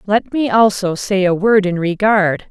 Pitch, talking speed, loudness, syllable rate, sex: 200 Hz, 190 wpm, -15 LUFS, 4.3 syllables/s, female